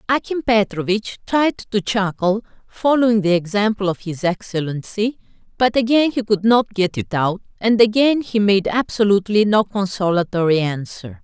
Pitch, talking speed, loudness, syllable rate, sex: 205 Hz, 145 wpm, -18 LUFS, 4.8 syllables/s, female